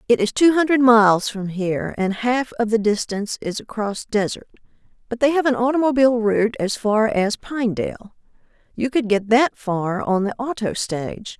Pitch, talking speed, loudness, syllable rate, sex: 225 Hz, 180 wpm, -20 LUFS, 5.2 syllables/s, female